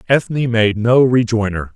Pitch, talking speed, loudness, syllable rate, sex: 115 Hz, 135 wpm, -15 LUFS, 4.5 syllables/s, male